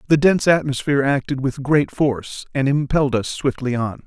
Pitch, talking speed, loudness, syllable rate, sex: 140 Hz, 175 wpm, -19 LUFS, 5.6 syllables/s, male